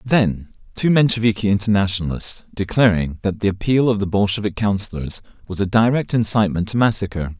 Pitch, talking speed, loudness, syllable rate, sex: 100 Hz, 145 wpm, -19 LUFS, 5.9 syllables/s, male